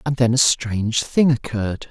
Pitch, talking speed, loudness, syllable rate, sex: 120 Hz, 190 wpm, -19 LUFS, 5.0 syllables/s, male